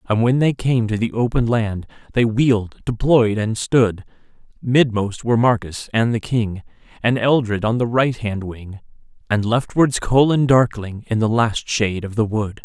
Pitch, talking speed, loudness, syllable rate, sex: 115 Hz, 170 wpm, -19 LUFS, 4.5 syllables/s, male